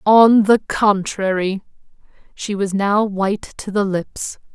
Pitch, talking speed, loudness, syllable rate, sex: 200 Hz, 130 wpm, -18 LUFS, 3.6 syllables/s, female